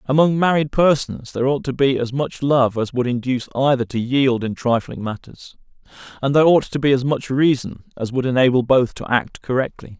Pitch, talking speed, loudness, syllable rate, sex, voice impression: 130 Hz, 205 wpm, -19 LUFS, 5.4 syllables/s, male, masculine, very adult-like, very middle-aged, thick, tensed, slightly powerful, bright, hard, clear, fluent, cool, intellectual, very sincere, very calm, mature, slightly friendly, reassuring, slightly unique, slightly wild, slightly sweet, kind, slightly intense